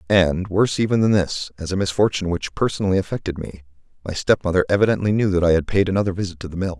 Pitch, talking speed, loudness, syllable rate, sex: 95 Hz, 220 wpm, -20 LUFS, 7.1 syllables/s, male